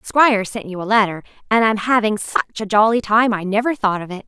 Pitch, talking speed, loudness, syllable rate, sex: 215 Hz, 240 wpm, -17 LUFS, 5.6 syllables/s, female